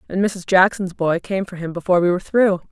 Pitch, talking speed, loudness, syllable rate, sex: 185 Hz, 245 wpm, -19 LUFS, 6.2 syllables/s, female